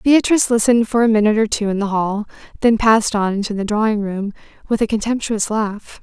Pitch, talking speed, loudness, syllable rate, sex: 215 Hz, 210 wpm, -17 LUFS, 6.1 syllables/s, female